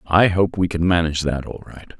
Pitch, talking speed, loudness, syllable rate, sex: 85 Hz, 240 wpm, -19 LUFS, 5.5 syllables/s, male